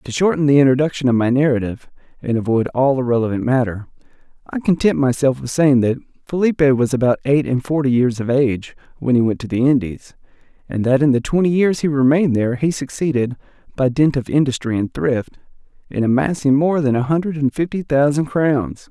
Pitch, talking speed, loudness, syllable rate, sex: 135 Hz, 190 wpm, -17 LUFS, 5.9 syllables/s, male